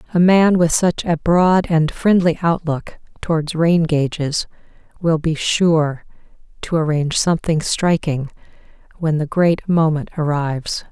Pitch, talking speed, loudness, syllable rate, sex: 160 Hz, 130 wpm, -17 LUFS, 4.2 syllables/s, female